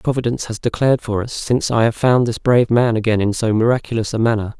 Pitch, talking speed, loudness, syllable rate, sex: 115 Hz, 235 wpm, -17 LUFS, 6.6 syllables/s, male